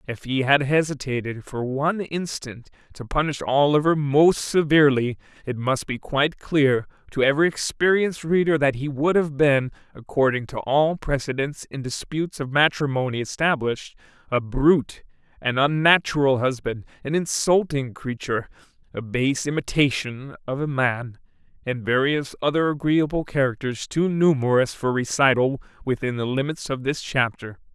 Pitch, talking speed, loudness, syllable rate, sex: 140 Hz, 140 wpm, -22 LUFS, 4.9 syllables/s, male